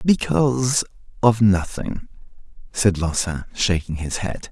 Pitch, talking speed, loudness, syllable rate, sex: 105 Hz, 105 wpm, -21 LUFS, 4.0 syllables/s, male